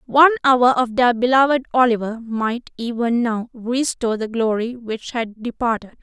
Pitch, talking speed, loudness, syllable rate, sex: 240 Hz, 150 wpm, -19 LUFS, 4.8 syllables/s, female